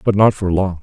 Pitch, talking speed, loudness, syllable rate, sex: 95 Hz, 290 wpm, -16 LUFS, 5.5 syllables/s, male